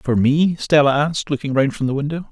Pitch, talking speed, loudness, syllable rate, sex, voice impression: 145 Hz, 235 wpm, -18 LUFS, 5.9 syllables/s, male, masculine, very adult-like, slightly thick, slightly fluent, cool, slightly refreshing, slightly wild